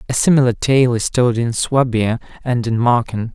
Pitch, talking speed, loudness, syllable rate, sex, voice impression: 120 Hz, 180 wpm, -16 LUFS, 4.8 syllables/s, male, masculine, adult-like, tensed, slightly weak, clear, slightly halting, slightly cool, calm, reassuring, lively, kind, slightly modest